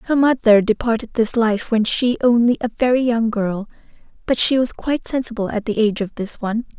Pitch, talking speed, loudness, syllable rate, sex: 230 Hz, 205 wpm, -18 LUFS, 5.5 syllables/s, female